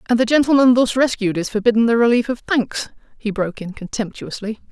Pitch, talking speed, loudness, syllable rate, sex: 225 Hz, 190 wpm, -18 LUFS, 6.0 syllables/s, female